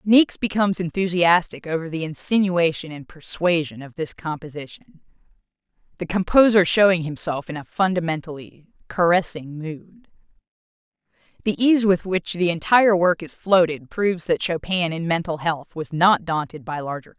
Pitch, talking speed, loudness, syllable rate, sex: 170 Hz, 145 wpm, -21 LUFS, 5.1 syllables/s, female